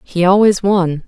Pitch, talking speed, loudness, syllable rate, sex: 185 Hz, 170 wpm, -13 LUFS, 4.1 syllables/s, female